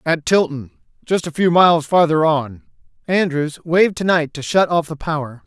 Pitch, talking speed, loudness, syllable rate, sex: 160 Hz, 175 wpm, -17 LUFS, 5.1 syllables/s, male